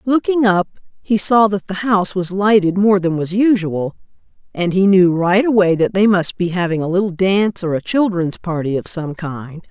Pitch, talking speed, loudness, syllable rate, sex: 190 Hz, 205 wpm, -16 LUFS, 5.0 syllables/s, female